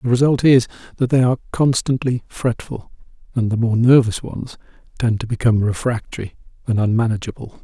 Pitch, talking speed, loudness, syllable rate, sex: 120 Hz, 150 wpm, -18 LUFS, 5.7 syllables/s, male